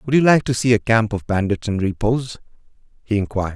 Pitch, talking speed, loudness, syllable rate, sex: 110 Hz, 220 wpm, -19 LUFS, 6.3 syllables/s, male